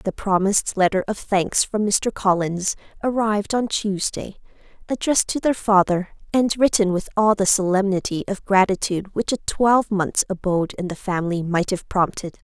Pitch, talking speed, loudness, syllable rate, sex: 195 Hz, 160 wpm, -21 LUFS, 5.2 syllables/s, female